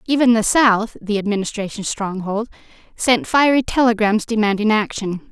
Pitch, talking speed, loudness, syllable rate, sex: 220 Hz, 125 wpm, -18 LUFS, 5.0 syllables/s, female